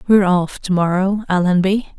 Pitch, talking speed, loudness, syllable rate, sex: 190 Hz, 150 wpm, -17 LUFS, 5.4 syllables/s, female